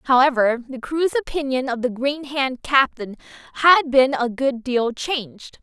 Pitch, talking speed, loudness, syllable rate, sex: 265 Hz, 160 wpm, -20 LUFS, 4.3 syllables/s, female